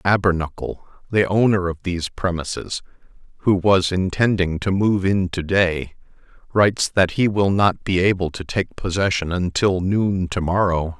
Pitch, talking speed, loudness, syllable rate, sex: 95 Hz, 155 wpm, -20 LUFS, 4.5 syllables/s, male